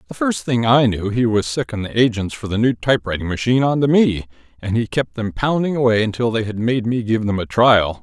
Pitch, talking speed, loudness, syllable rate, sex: 115 Hz, 245 wpm, -18 LUFS, 5.7 syllables/s, male